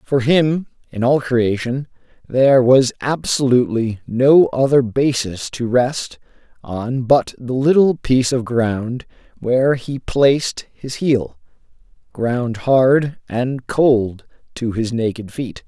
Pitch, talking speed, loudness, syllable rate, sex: 125 Hz, 125 wpm, -17 LUFS, 3.6 syllables/s, male